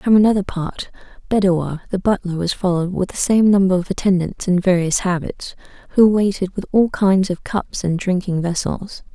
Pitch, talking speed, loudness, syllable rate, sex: 190 Hz, 175 wpm, -18 LUFS, 5.1 syllables/s, female